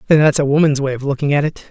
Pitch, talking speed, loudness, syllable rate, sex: 145 Hz, 280 wpm, -16 LUFS, 6.8 syllables/s, male